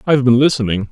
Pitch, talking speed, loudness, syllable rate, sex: 120 Hz, 195 wpm, -14 LUFS, 7.8 syllables/s, male